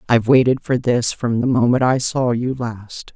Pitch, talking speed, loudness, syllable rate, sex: 120 Hz, 210 wpm, -17 LUFS, 4.7 syllables/s, female